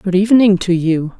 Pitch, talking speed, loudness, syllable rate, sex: 190 Hz, 200 wpm, -13 LUFS, 5.3 syllables/s, female